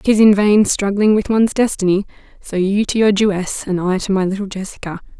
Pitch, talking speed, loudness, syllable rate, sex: 200 Hz, 195 wpm, -16 LUFS, 5.7 syllables/s, female